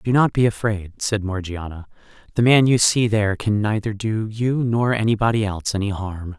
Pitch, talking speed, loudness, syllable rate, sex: 105 Hz, 190 wpm, -20 LUFS, 5.1 syllables/s, male